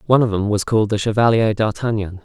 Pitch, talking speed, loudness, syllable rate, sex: 110 Hz, 215 wpm, -18 LUFS, 6.8 syllables/s, male